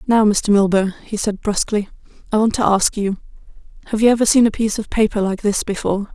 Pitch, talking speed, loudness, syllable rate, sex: 210 Hz, 215 wpm, -17 LUFS, 6.3 syllables/s, female